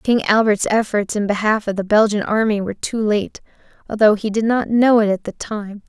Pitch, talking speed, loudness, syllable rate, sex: 210 Hz, 215 wpm, -17 LUFS, 5.3 syllables/s, female